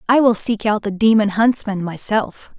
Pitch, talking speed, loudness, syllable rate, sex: 215 Hz, 185 wpm, -17 LUFS, 4.6 syllables/s, female